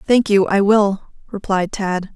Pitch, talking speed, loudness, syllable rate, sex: 200 Hz, 165 wpm, -17 LUFS, 4.1 syllables/s, female